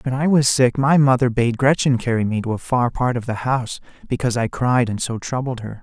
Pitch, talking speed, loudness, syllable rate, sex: 125 Hz, 245 wpm, -19 LUFS, 5.7 syllables/s, male